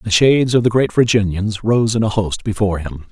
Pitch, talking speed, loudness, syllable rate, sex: 105 Hz, 230 wpm, -16 LUFS, 5.7 syllables/s, male